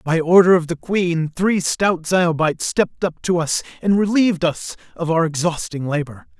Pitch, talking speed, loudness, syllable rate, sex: 170 Hz, 180 wpm, -18 LUFS, 4.8 syllables/s, male